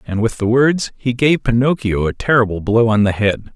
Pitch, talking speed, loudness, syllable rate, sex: 115 Hz, 220 wpm, -16 LUFS, 5.1 syllables/s, male